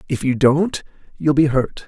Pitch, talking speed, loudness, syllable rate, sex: 145 Hz, 190 wpm, -18 LUFS, 4.3 syllables/s, male